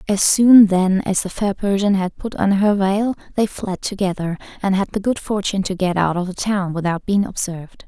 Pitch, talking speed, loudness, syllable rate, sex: 195 Hz, 220 wpm, -18 LUFS, 5.1 syllables/s, female